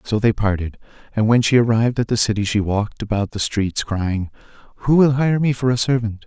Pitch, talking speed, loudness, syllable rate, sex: 115 Hz, 220 wpm, -19 LUFS, 5.7 syllables/s, male